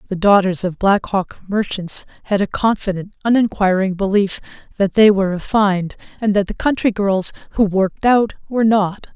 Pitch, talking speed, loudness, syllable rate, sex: 200 Hz, 165 wpm, -17 LUFS, 5.2 syllables/s, female